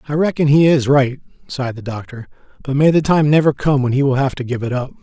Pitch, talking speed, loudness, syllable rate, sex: 140 Hz, 265 wpm, -16 LUFS, 6.2 syllables/s, male